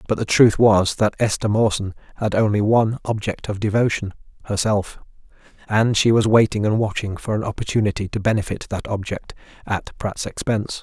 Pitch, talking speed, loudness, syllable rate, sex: 105 Hz, 150 wpm, -20 LUFS, 5.5 syllables/s, male